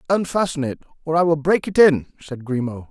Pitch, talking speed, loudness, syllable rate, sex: 150 Hz, 205 wpm, -19 LUFS, 5.8 syllables/s, male